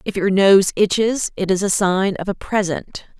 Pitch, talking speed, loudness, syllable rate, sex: 195 Hz, 205 wpm, -17 LUFS, 4.5 syllables/s, female